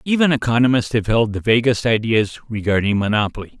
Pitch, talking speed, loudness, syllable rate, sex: 115 Hz, 150 wpm, -18 LUFS, 5.9 syllables/s, male